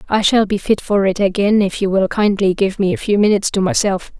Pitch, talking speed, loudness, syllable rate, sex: 195 Hz, 255 wpm, -16 LUFS, 5.8 syllables/s, female